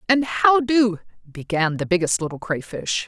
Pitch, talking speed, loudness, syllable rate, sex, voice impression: 195 Hz, 155 wpm, -20 LUFS, 4.5 syllables/s, female, feminine, adult-like, tensed, powerful, hard, fluent, intellectual, calm, slightly friendly, elegant, lively, slightly strict, slightly sharp